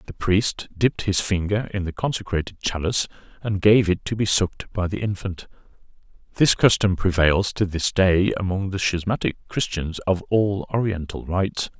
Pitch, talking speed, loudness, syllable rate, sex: 95 Hz, 165 wpm, -22 LUFS, 5.0 syllables/s, male